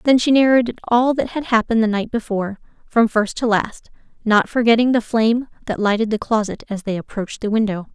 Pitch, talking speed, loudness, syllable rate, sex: 225 Hz, 205 wpm, -18 LUFS, 5.9 syllables/s, female